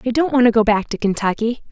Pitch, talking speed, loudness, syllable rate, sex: 230 Hz, 280 wpm, -17 LUFS, 6.7 syllables/s, female